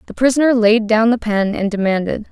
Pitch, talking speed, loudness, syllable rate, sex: 220 Hz, 205 wpm, -15 LUFS, 5.7 syllables/s, female